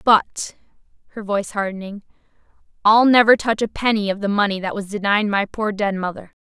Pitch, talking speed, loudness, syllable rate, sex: 205 Hz, 175 wpm, -19 LUFS, 5.6 syllables/s, female